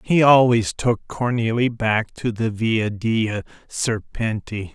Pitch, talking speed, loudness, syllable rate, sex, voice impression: 115 Hz, 125 wpm, -20 LUFS, 3.2 syllables/s, male, masculine, middle-aged, thick, tensed, powerful, slightly hard, clear, cool, calm, mature, slightly friendly, wild, lively, strict